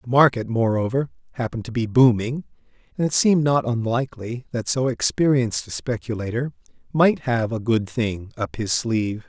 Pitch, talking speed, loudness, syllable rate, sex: 120 Hz, 160 wpm, -22 LUFS, 5.3 syllables/s, male